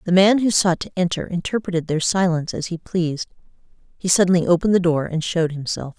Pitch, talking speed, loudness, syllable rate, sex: 175 Hz, 200 wpm, -20 LUFS, 6.5 syllables/s, female